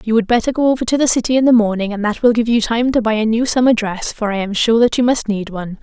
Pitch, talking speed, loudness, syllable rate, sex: 225 Hz, 330 wpm, -15 LUFS, 6.6 syllables/s, female